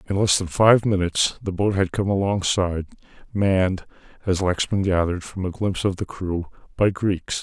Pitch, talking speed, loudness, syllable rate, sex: 95 Hz, 180 wpm, -22 LUFS, 5.2 syllables/s, male